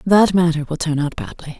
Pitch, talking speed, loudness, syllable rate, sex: 160 Hz, 225 wpm, -18 LUFS, 5.5 syllables/s, female